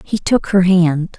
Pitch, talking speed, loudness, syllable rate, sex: 180 Hz, 205 wpm, -14 LUFS, 3.7 syllables/s, female